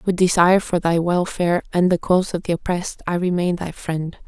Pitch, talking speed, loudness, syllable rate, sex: 175 Hz, 210 wpm, -20 LUFS, 5.8 syllables/s, female